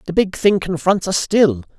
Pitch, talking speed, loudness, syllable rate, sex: 180 Hz, 200 wpm, -17 LUFS, 4.6 syllables/s, male